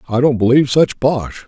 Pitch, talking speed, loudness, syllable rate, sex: 130 Hz, 205 wpm, -14 LUFS, 5.4 syllables/s, male